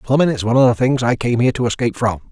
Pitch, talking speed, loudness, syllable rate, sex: 120 Hz, 310 wpm, -16 LUFS, 7.7 syllables/s, male